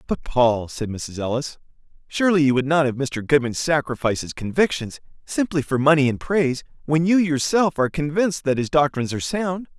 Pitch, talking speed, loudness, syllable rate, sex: 145 Hz, 185 wpm, -21 LUFS, 5.7 syllables/s, male